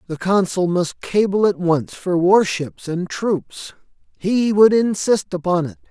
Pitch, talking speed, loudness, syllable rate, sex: 185 Hz, 165 wpm, -18 LUFS, 3.9 syllables/s, male